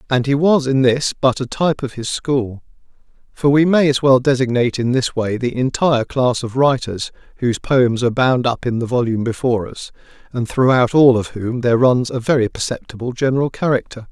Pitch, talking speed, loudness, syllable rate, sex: 125 Hz, 200 wpm, -17 LUFS, 5.6 syllables/s, male